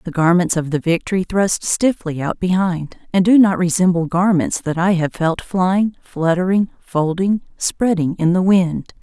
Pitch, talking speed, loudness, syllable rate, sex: 180 Hz, 165 wpm, -17 LUFS, 4.4 syllables/s, female